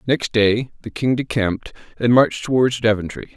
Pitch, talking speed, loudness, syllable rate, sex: 115 Hz, 160 wpm, -19 LUFS, 5.3 syllables/s, male